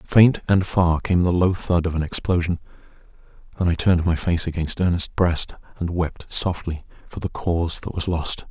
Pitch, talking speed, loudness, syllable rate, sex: 85 Hz, 190 wpm, -22 LUFS, 5.0 syllables/s, male